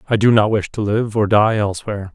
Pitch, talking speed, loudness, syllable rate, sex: 105 Hz, 250 wpm, -17 LUFS, 6.2 syllables/s, male